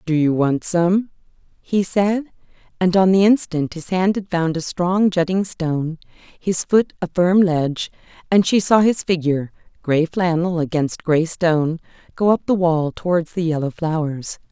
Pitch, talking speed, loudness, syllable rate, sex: 175 Hz, 165 wpm, -19 LUFS, 4.4 syllables/s, female